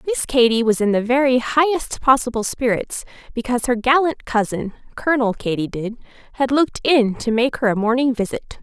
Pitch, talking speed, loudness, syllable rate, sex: 245 Hz, 175 wpm, -19 LUFS, 5.4 syllables/s, female